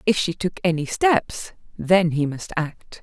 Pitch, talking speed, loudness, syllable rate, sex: 175 Hz, 180 wpm, -21 LUFS, 3.9 syllables/s, female